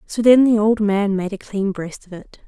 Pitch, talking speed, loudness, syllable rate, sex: 205 Hz, 265 wpm, -17 LUFS, 4.7 syllables/s, female